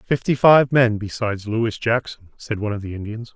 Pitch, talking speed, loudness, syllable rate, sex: 115 Hz, 195 wpm, -20 LUFS, 5.6 syllables/s, male